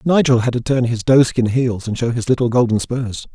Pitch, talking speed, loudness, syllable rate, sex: 120 Hz, 235 wpm, -17 LUFS, 5.3 syllables/s, male